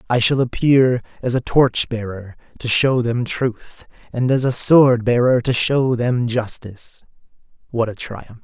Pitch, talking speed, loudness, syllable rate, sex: 120 Hz, 165 wpm, -18 LUFS, 4.1 syllables/s, male